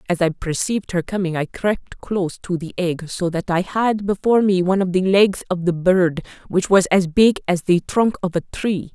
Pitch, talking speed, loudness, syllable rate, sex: 185 Hz, 230 wpm, -19 LUFS, 5.1 syllables/s, female